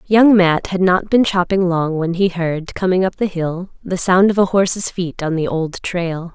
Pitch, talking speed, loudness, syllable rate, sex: 180 Hz, 225 wpm, -17 LUFS, 4.4 syllables/s, female